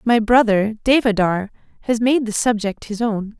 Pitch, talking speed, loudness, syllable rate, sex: 220 Hz, 160 wpm, -18 LUFS, 4.5 syllables/s, female